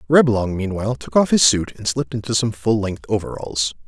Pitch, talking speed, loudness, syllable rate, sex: 110 Hz, 200 wpm, -19 LUFS, 5.7 syllables/s, male